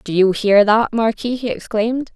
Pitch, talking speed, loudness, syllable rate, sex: 220 Hz, 195 wpm, -17 LUFS, 4.9 syllables/s, female